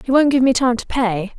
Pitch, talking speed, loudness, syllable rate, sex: 245 Hz, 300 wpm, -17 LUFS, 5.7 syllables/s, female